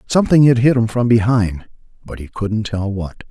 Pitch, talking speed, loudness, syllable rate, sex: 115 Hz, 200 wpm, -16 LUFS, 5.1 syllables/s, male